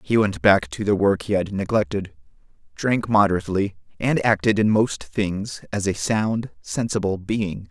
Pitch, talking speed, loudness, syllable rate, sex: 105 Hz, 165 wpm, -22 LUFS, 4.5 syllables/s, male